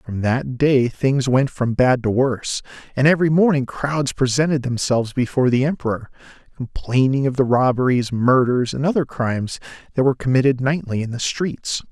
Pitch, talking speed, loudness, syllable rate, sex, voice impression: 130 Hz, 165 wpm, -19 LUFS, 5.3 syllables/s, male, very masculine, very adult-like, very middle-aged, slightly old, very thick, very tensed, very powerful, bright, slightly soft, very clear, fluent, very cool, intellectual, sincere, very calm, very mature, friendly, reassuring, wild, slightly sweet, lively, very kind